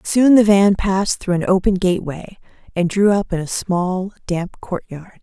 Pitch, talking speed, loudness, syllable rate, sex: 190 Hz, 185 wpm, -17 LUFS, 4.6 syllables/s, female